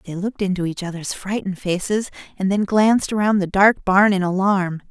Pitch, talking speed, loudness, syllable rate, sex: 195 Hz, 195 wpm, -19 LUFS, 5.6 syllables/s, female